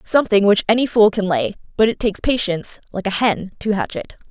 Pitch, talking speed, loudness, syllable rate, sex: 205 Hz, 225 wpm, -18 LUFS, 6.0 syllables/s, female